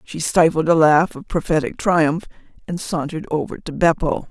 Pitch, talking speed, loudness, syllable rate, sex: 165 Hz, 165 wpm, -19 LUFS, 5.1 syllables/s, female